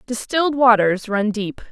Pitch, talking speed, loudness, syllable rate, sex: 235 Hz, 140 wpm, -18 LUFS, 4.6 syllables/s, female